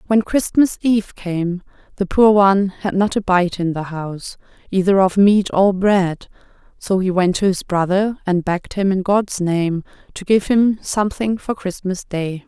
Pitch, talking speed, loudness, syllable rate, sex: 190 Hz, 185 wpm, -18 LUFS, 4.5 syllables/s, female